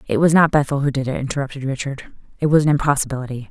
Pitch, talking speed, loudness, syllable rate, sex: 140 Hz, 220 wpm, -19 LUFS, 7.5 syllables/s, female